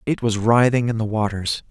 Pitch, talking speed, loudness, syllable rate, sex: 115 Hz, 210 wpm, -20 LUFS, 5.2 syllables/s, male